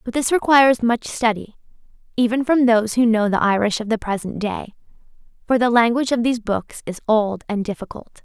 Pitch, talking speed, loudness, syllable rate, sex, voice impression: 230 Hz, 190 wpm, -19 LUFS, 5.7 syllables/s, female, very feminine, very young, very thin, tensed, powerful, bright, slightly soft, very clear, very fluent, slightly raspy, very cute, intellectual, very refreshing, sincere, slightly calm, very friendly, very reassuring, very unique, elegant, slightly wild, sweet, very lively, kind, intense, very light